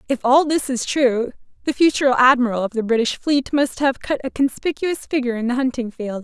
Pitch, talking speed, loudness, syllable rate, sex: 255 Hz, 210 wpm, -19 LUFS, 5.6 syllables/s, female